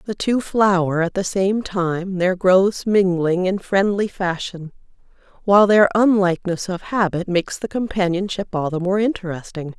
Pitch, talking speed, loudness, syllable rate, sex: 190 Hz, 155 wpm, -19 LUFS, 4.6 syllables/s, female